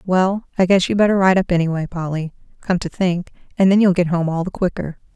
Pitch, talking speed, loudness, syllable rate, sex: 180 Hz, 235 wpm, -18 LUFS, 5.9 syllables/s, female